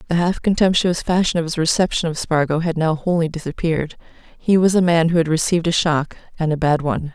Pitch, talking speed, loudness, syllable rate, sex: 165 Hz, 220 wpm, -18 LUFS, 6.1 syllables/s, female